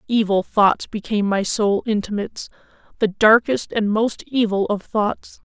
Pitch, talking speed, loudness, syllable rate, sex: 210 Hz, 130 wpm, -19 LUFS, 4.4 syllables/s, female